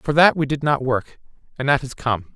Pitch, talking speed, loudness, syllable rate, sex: 135 Hz, 255 wpm, -20 LUFS, 5.2 syllables/s, male